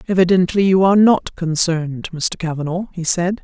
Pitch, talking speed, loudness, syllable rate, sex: 175 Hz, 155 wpm, -17 LUFS, 5.4 syllables/s, female